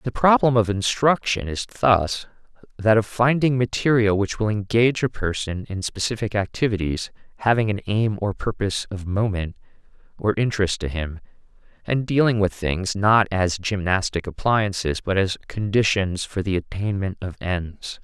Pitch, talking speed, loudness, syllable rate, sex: 105 Hz, 150 wpm, -22 LUFS, 4.7 syllables/s, male